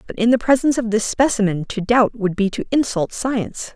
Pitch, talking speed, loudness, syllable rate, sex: 225 Hz, 225 wpm, -19 LUFS, 5.7 syllables/s, female